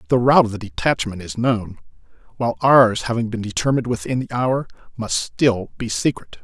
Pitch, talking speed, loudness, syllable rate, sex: 115 Hz, 175 wpm, -19 LUFS, 5.7 syllables/s, male